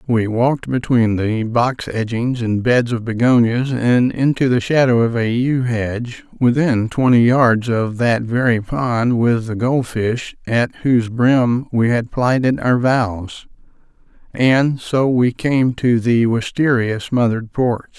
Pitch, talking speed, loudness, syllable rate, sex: 120 Hz, 155 wpm, -17 LUFS, 3.8 syllables/s, male